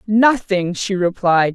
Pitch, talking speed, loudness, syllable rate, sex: 195 Hz, 115 wpm, -17 LUFS, 3.5 syllables/s, female